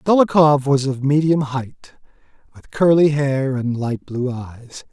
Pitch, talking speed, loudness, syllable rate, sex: 140 Hz, 145 wpm, -18 LUFS, 3.8 syllables/s, male